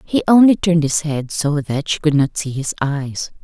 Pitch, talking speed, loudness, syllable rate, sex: 155 Hz, 225 wpm, -17 LUFS, 4.8 syllables/s, female